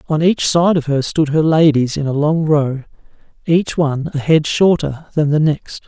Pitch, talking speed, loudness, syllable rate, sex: 150 Hz, 205 wpm, -15 LUFS, 4.6 syllables/s, male